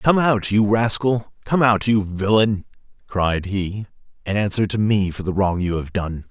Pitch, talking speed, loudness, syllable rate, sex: 100 Hz, 190 wpm, -20 LUFS, 4.3 syllables/s, male